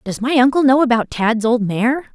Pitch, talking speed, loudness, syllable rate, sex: 245 Hz, 225 wpm, -16 LUFS, 5.0 syllables/s, female